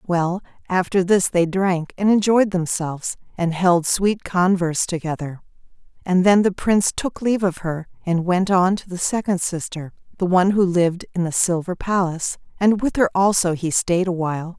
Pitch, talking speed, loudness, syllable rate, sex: 180 Hz, 175 wpm, -20 LUFS, 5.0 syllables/s, female